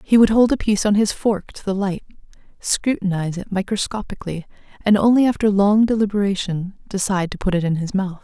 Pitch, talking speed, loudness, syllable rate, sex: 200 Hz, 190 wpm, -19 LUFS, 6.0 syllables/s, female